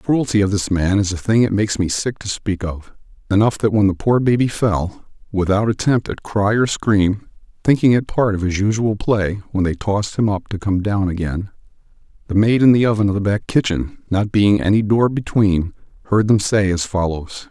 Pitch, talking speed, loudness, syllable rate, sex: 105 Hz, 215 wpm, -18 LUFS, 3.5 syllables/s, male